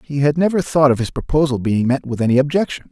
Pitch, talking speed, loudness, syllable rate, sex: 140 Hz, 245 wpm, -17 LUFS, 6.4 syllables/s, male